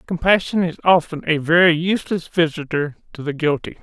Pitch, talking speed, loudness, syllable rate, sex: 165 Hz, 155 wpm, -18 LUFS, 5.6 syllables/s, male